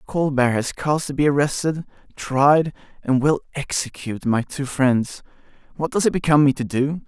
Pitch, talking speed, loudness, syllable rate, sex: 140 Hz, 170 wpm, -20 LUFS, 5.1 syllables/s, male